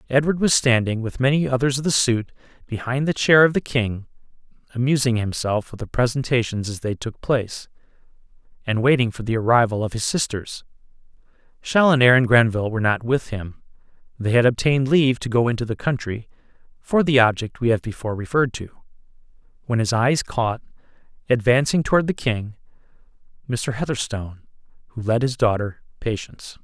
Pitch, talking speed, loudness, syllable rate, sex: 120 Hz, 155 wpm, -20 LUFS, 5.7 syllables/s, male